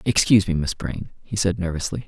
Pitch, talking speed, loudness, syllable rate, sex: 95 Hz, 205 wpm, -22 LUFS, 6.2 syllables/s, male